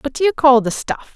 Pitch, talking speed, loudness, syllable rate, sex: 275 Hz, 260 wpm, -16 LUFS, 4.8 syllables/s, female